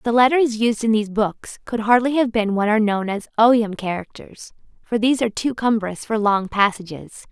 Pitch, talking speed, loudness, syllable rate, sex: 220 Hz, 195 wpm, -19 LUFS, 5.3 syllables/s, female